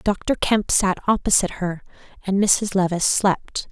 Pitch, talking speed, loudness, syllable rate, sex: 195 Hz, 130 wpm, -20 LUFS, 4.4 syllables/s, female